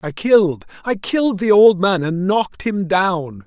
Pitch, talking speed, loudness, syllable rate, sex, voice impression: 190 Hz, 190 wpm, -16 LUFS, 4.4 syllables/s, male, masculine, slightly old, powerful, slightly hard, clear, raspy, mature, friendly, wild, lively, strict, slightly sharp